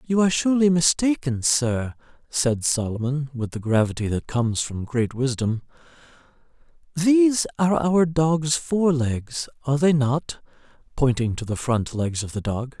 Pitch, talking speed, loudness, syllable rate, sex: 140 Hz, 150 wpm, -22 LUFS, 4.6 syllables/s, male